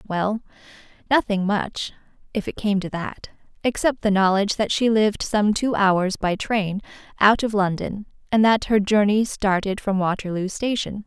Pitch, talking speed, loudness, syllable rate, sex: 205 Hz, 165 wpm, -21 LUFS, 4.6 syllables/s, female